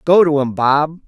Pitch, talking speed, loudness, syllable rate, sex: 150 Hz, 225 wpm, -15 LUFS, 4.3 syllables/s, male